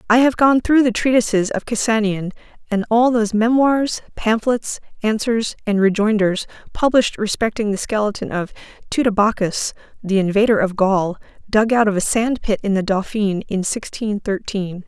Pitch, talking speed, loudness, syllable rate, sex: 215 Hz, 150 wpm, -18 LUFS, 5.0 syllables/s, female